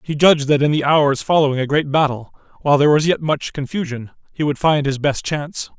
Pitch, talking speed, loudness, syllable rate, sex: 145 Hz, 230 wpm, -17 LUFS, 6.1 syllables/s, male